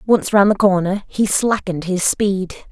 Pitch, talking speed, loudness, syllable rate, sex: 195 Hz, 175 wpm, -17 LUFS, 4.6 syllables/s, female